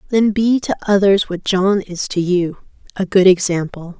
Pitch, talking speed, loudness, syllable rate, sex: 190 Hz, 165 wpm, -16 LUFS, 4.6 syllables/s, female